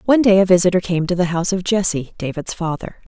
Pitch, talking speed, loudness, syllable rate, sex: 180 Hz, 230 wpm, -17 LUFS, 6.7 syllables/s, female